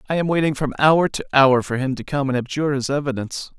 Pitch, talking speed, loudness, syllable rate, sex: 140 Hz, 250 wpm, -20 LUFS, 6.5 syllables/s, male